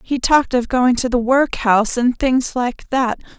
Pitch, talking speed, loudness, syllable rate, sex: 250 Hz, 195 wpm, -17 LUFS, 4.5 syllables/s, female